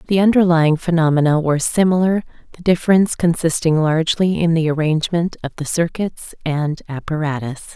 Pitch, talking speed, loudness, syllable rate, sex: 165 Hz, 130 wpm, -17 LUFS, 5.6 syllables/s, female